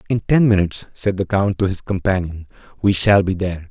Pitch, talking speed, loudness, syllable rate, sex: 95 Hz, 210 wpm, -18 LUFS, 5.8 syllables/s, male